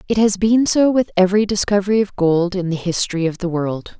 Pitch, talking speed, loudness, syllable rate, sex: 195 Hz, 225 wpm, -17 LUFS, 5.9 syllables/s, female